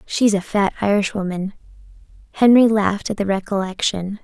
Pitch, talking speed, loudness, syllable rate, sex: 200 Hz, 125 wpm, -18 LUFS, 5.3 syllables/s, female